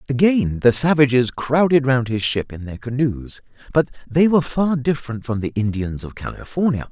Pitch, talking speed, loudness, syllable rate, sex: 130 Hz, 175 wpm, -19 LUFS, 5.3 syllables/s, male